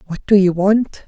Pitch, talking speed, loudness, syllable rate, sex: 195 Hz, 225 wpm, -15 LUFS, 4.5 syllables/s, female